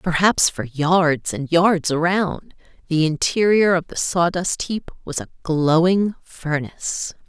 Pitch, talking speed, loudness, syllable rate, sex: 170 Hz, 130 wpm, -20 LUFS, 3.7 syllables/s, female